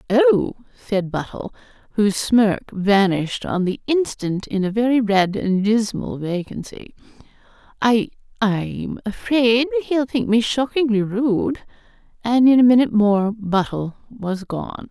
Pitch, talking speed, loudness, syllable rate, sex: 220 Hz, 125 wpm, -19 LUFS, 4.0 syllables/s, female